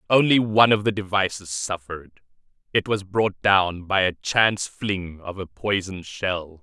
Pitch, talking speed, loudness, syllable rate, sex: 95 Hz, 165 wpm, -22 LUFS, 4.4 syllables/s, male